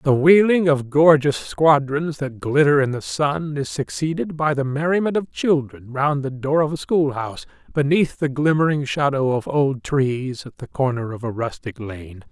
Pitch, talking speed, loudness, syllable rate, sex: 140 Hz, 180 wpm, -20 LUFS, 4.5 syllables/s, male